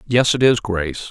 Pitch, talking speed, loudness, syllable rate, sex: 110 Hz, 215 wpm, -17 LUFS, 5.2 syllables/s, male